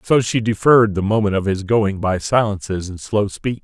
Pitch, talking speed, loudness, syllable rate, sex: 105 Hz, 215 wpm, -18 LUFS, 5.1 syllables/s, male